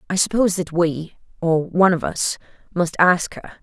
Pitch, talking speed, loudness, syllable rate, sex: 175 Hz, 150 wpm, -20 LUFS, 5.4 syllables/s, female